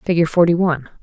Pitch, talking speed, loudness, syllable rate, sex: 165 Hz, 175 wpm, -16 LUFS, 5.6 syllables/s, female